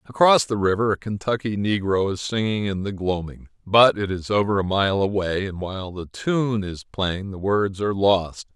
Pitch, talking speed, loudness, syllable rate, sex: 100 Hz, 195 wpm, -22 LUFS, 4.8 syllables/s, male